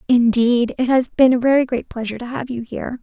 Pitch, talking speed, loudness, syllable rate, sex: 245 Hz, 240 wpm, -18 LUFS, 6.1 syllables/s, female